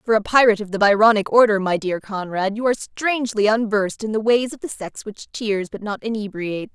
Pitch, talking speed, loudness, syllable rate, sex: 215 Hz, 220 wpm, -20 LUFS, 5.9 syllables/s, female